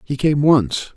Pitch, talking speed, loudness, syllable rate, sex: 140 Hz, 190 wpm, -17 LUFS, 3.9 syllables/s, male